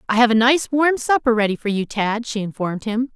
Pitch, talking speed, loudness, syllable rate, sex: 230 Hz, 245 wpm, -19 LUFS, 5.7 syllables/s, female